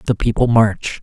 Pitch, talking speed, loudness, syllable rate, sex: 110 Hz, 175 wpm, -16 LUFS, 4.0 syllables/s, male